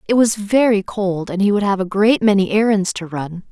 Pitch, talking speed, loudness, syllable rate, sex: 200 Hz, 240 wpm, -17 LUFS, 5.1 syllables/s, female